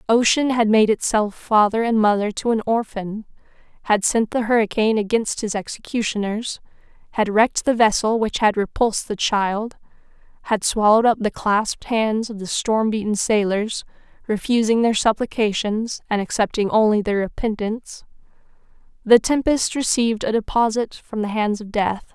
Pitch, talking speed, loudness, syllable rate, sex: 220 Hz, 150 wpm, -20 LUFS, 5.0 syllables/s, female